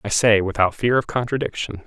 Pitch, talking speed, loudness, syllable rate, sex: 110 Hz, 195 wpm, -20 LUFS, 5.7 syllables/s, male